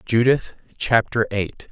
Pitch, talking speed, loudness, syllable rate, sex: 115 Hz, 105 wpm, -20 LUFS, 3.7 syllables/s, male